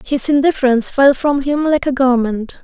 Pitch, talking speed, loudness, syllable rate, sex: 270 Hz, 180 wpm, -14 LUFS, 5.2 syllables/s, female